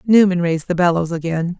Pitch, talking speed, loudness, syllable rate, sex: 175 Hz, 190 wpm, -17 LUFS, 6.2 syllables/s, female